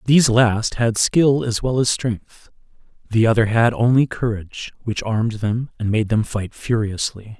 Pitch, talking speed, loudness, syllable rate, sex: 115 Hz, 170 wpm, -19 LUFS, 4.5 syllables/s, male